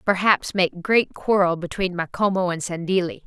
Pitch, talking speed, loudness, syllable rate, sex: 185 Hz, 145 wpm, -21 LUFS, 4.8 syllables/s, female